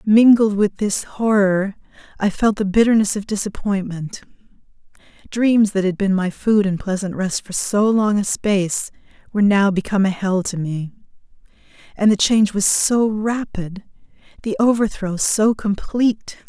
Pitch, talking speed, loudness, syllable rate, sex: 205 Hz, 150 wpm, -18 LUFS, 4.6 syllables/s, female